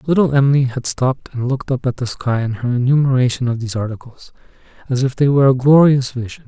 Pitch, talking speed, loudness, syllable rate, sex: 130 Hz, 215 wpm, -16 LUFS, 6.4 syllables/s, male